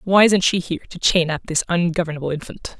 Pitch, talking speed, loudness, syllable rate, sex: 170 Hz, 215 wpm, -19 LUFS, 6.3 syllables/s, female